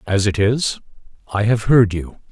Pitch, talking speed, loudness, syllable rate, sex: 105 Hz, 180 wpm, -18 LUFS, 4.4 syllables/s, male